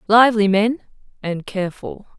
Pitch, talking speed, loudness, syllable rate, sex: 210 Hz, 110 wpm, -18 LUFS, 5.2 syllables/s, female